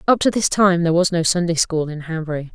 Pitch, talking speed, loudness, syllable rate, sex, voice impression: 170 Hz, 260 wpm, -18 LUFS, 6.2 syllables/s, female, feminine, adult-like, tensed, powerful, intellectual, calm, elegant, lively, slightly sharp